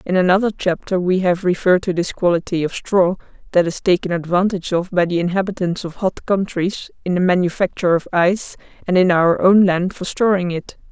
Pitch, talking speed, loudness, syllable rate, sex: 180 Hz, 190 wpm, -18 LUFS, 5.7 syllables/s, female